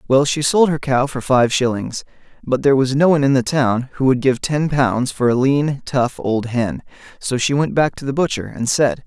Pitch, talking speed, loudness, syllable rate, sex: 130 Hz, 240 wpm, -17 LUFS, 5.0 syllables/s, male